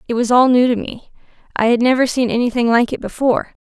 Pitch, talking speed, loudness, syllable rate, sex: 245 Hz, 245 wpm, -16 LUFS, 6.5 syllables/s, female